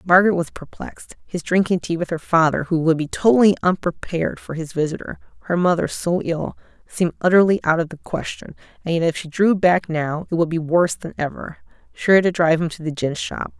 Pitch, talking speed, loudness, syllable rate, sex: 170 Hz, 200 wpm, -20 LUFS, 5.8 syllables/s, female